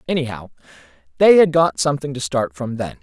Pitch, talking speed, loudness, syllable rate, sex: 125 Hz, 180 wpm, -18 LUFS, 6.0 syllables/s, male